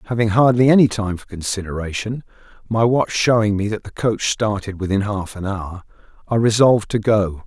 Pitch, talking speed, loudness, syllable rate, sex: 105 Hz, 160 wpm, -18 LUFS, 5.4 syllables/s, male